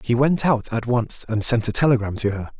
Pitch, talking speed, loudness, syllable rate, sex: 120 Hz, 255 wpm, -21 LUFS, 5.4 syllables/s, male